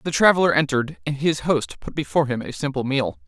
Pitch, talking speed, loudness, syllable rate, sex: 145 Hz, 220 wpm, -21 LUFS, 6.2 syllables/s, male